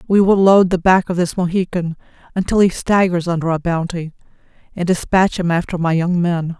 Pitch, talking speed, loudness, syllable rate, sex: 175 Hz, 190 wpm, -16 LUFS, 5.4 syllables/s, female